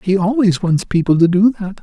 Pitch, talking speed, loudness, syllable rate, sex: 190 Hz, 230 wpm, -14 LUFS, 5.2 syllables/s, male